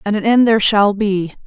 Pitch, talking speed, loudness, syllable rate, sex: 205 Hz, 245 wpm, -14 LUFS, 5.7 syllables/s, female